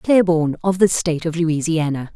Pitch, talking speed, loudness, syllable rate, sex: 165 Hz, 165 wpm, -18 LUFS, 5.4 syllables/s, female